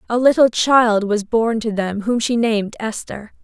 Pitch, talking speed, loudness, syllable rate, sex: 225 Hz, 190 wpm, -17 LUFS, 4.4 syllables/s, female